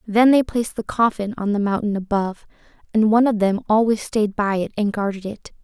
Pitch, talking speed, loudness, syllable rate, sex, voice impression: 215 Hz, 215 wpm, -20 LUFS, 5.8 syllables/s, female, very feminine, very young, very thin, tensed, slightly powerful, weak, very bright, hard, very clear, fluent, very cute, intellectual, very refreshing, sincere, calm, very friendly, very reassuring, elegant, very sweet, slightly lively, kind, slightly intense